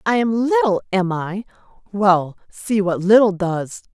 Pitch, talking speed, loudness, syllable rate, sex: 190 Hz, 150 wpm, -18 LUFS, 4.0 syllables/s, female